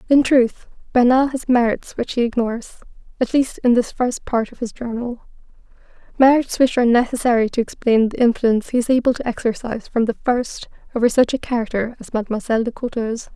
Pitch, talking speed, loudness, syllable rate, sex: 240 Hz, 185 wpm, -19 LUFS, 6.0 syllables/s, female